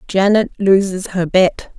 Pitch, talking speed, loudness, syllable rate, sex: 190 Hz, 135 wpm, -15 LUFS, 4.0 syllables/s, female